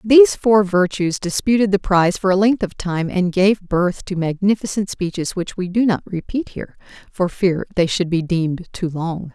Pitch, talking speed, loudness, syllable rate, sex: 190 Hz, 200 wpm, -18 LUFS, 4.9 syllables/s, female